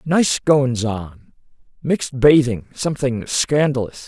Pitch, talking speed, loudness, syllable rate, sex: 130 Hz, 90 wpm, -18 LUFS, 4.0 syllables/s, male